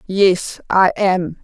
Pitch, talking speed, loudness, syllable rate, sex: 185 Hz, 125 wpm, -16 LUFS, 2.6 syllables/s, female